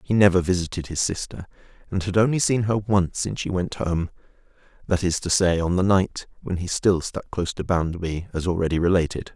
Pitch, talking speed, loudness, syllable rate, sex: 90 Hz, 205 wpm, -23 LUFS, 5.7 syllables/s, male